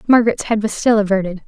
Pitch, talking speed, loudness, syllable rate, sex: 210 Hz, 205 wpm, -16 LUFS, 6.9 syllables/s, female